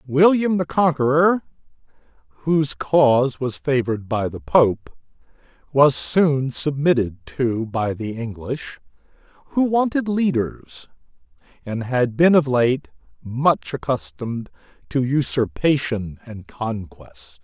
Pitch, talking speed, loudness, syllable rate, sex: 130 Hz, 105 wpm, -20 LUFS, 3.8 syllables/s, male